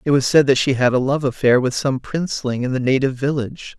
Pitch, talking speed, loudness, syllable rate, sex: 135 Hz, 255 wpm, -18 LUFS, 6.2 syllables/s, male